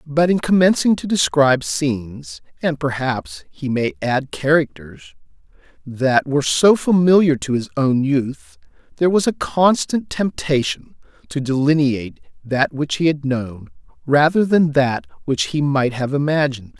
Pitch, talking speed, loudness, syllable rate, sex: 140 Hz, 145 wpm, -18 LUFS, 4.4 syllables/s, male